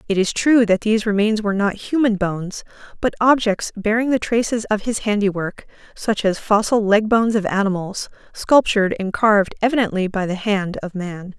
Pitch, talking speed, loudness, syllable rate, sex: 210 Hz, 180 wpm, -19 LUFS, 5.3 syllables/s, female